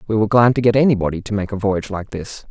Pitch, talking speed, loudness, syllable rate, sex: 105 Hz, 290 wpm, -17 LUFS, 7.3 syllables/s, male